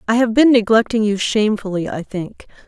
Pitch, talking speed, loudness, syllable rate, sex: 215 Hz, 180 wpm, -16 LUFS, 5.6 syllables/s, female